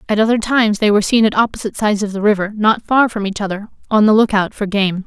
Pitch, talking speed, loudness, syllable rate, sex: 210 Hz, 275 wpm, -15 LUFS, 6.8 syllables/s, female